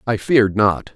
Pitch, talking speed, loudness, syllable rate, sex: 110 Hz, 190 wpm, -16 LUFS, 4.9 syllables/s, male